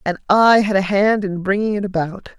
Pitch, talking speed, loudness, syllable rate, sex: 200 Hz, 225 wpm, -17 LUFS, 5.2 syllables/s, female